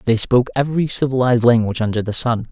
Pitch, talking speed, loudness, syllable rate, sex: 120 Hz, 190 wpm, -17 LUFS, 7.4 syllables/s, male